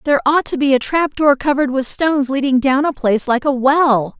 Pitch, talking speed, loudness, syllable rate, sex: 275 Hz, 245 wpm, -15 LUFS, 5.8 syllables/s, female